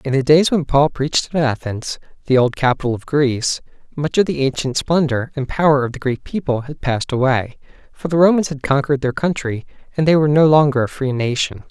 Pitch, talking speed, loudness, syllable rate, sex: 140 Hz, 215 wpm, -17 LUFS, 5.8 syllables/s, male